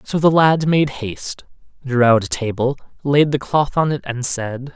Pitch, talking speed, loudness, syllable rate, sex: 135 Hz, 200 wpm, -18 LUFS, 4.5 syllables/s, male